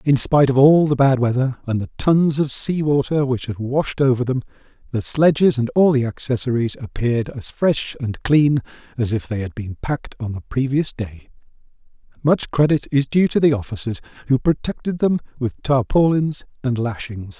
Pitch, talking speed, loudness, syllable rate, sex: 130 Hz, 180 wpm, -19 LUFS, 5.0 syllables/s, male